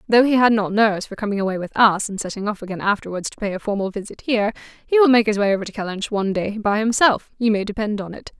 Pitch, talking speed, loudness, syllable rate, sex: 210 Hz, 270 wpm, -20 LUFS, 7.0 syllables/s, female